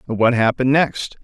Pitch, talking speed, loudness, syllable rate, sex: 125 Hz, 145 wpm, -17 LUFS, 4.8 syllables/s, male